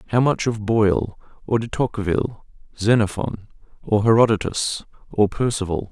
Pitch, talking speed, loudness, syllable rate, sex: 110 Hz, 120 wpm, -21 LUFS, 5.2 syllables/s, male